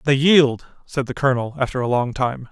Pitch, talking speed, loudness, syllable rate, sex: 130 Hz, 215 wpm, -19 LUFS, 5.6 syllables/s, male